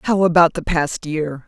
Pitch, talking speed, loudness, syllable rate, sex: 165 Hz, 205 wpm, -18 LUFS, 4.2 syllables/s, female